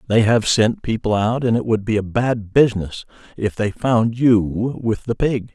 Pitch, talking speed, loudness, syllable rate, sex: 115 Hz, 205 wpm, -19 LUFS, 4.4 syllables/s, male